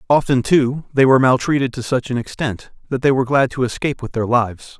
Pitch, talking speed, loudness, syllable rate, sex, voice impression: 130 Hz, 225 wpm, -18 LUFS, 6.2 syllables/s, male, very masculine, very middle-aged, thick, tensed, powerful, slightly dark, slightly hard, slightly clear, fluent, slightly raspy, cool, intellectual, slightly refreshing, sincere, slightly calm, friendly, reassuring, slightly unique, slightly elegant, wild, slightly sweet, slightly lively, slightly strict, slightly modest